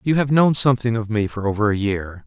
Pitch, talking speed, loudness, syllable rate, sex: 115 Hz, 265 wpm, -19 LUFS, 6.0 syllables/s, male